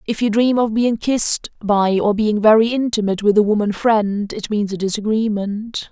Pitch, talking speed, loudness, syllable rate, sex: 215 Hz, 195 wpm, -17 LUFS, 4.9 syllables/s, female